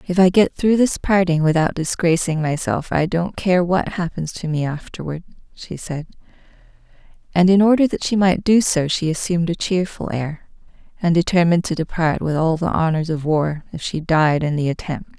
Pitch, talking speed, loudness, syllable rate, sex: 170 Hz, 190 wpm, -19 LUFS, 5.1 syllables/s, female